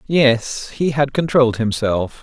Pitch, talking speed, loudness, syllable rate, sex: 130 Hz, 135 wpm, -18 LUFS, 3.9 syllables/s, male